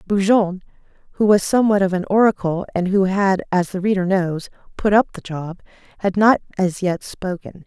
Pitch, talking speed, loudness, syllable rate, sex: 190 Hz, 180 wpm, -19 LUFS, 5.1 syllables/s, female